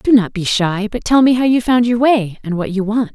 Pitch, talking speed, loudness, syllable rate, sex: 220 Hz, 305 wpm, -15 LUFS, 5.3 syllables/s, female